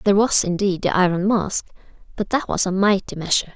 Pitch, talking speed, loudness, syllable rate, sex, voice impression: 195 Hz, 205 wpm, -20 LUFS, 6.0 syllables/s, female, feminine, slightly adult-like, slightly relaxed, soft, slightly cute, calm, friendly